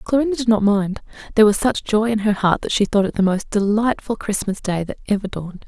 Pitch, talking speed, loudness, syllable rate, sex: 210 Hz, 255 wpm, -19 LUFS, 6.2 syllables/s, female